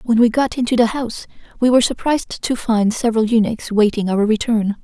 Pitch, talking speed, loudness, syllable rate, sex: 230 Hz, 200 wpm, -17 LUFS, 5.9 syllables/s, female